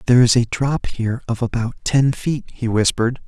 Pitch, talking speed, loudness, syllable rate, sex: 120 Hz, 200 wpm, -19 LUFS, 5.7 syllables/s, male